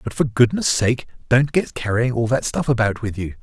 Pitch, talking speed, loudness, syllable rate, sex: 120 Hz, 230 wpm, -20 LUFS, 5.1 syllables/s, male